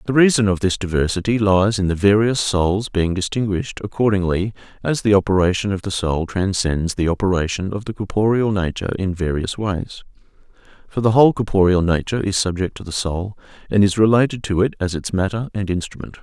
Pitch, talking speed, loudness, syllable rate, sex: 100 Hz, 180 wpm, -19 LUFS, 5.8 syllables/s, male